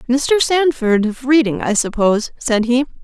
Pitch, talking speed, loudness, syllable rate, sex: 250 Hz, 160 wpm, -16 LUFS, 4.9 syllables/s, female